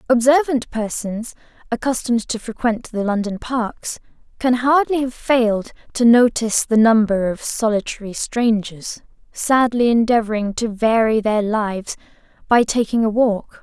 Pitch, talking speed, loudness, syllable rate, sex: 230 Hz, 130 wpm, -18 LUFS, 4.5 syllables/s, female